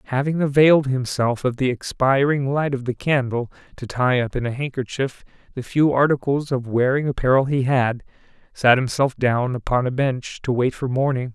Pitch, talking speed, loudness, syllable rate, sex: 130 Hz, 180 wpm, -20 LUFS, 5.0 syllables/s, male